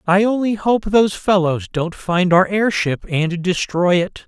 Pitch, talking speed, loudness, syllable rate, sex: 185 Hz, 170 wpm, -17 LUFS, 4.2 syllables/s, male